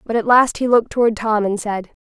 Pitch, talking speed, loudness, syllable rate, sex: 220 Hz, 265 wpm, -17 LUFS, 6.0 syllables/s, female